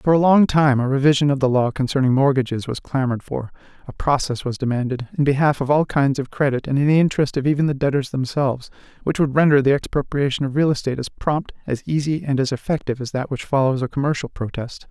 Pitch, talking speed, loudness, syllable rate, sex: 140 Hz, 225 wpm, -20 LUFS, 6.4 syllables/s, male